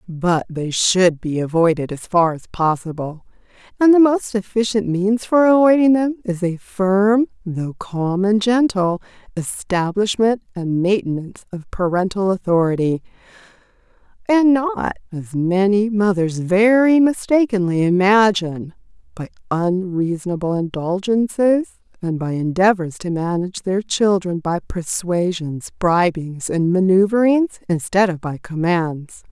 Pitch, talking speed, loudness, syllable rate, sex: 190 Hz, 115 wpm, -18 LUFS, 4.2 syllables/s, female